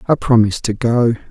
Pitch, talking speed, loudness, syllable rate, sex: 115 Hz, 185 wpm, -15 LUFS, 5.7 syllables/s, male